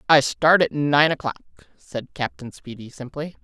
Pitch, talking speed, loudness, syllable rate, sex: 145 Hz, 155 wpm, -21 LUFS, 4.6 syllables/s, female